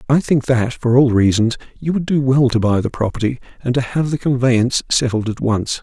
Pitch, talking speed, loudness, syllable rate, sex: 125 Hz, 225 wpm, -17 LUFS, 5.4 syllables/s, male